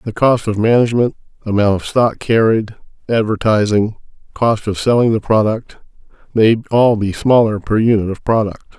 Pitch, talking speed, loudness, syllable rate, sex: 110 Hz, 150 wpm, -15 LUFS, 5.1 syllables/s, male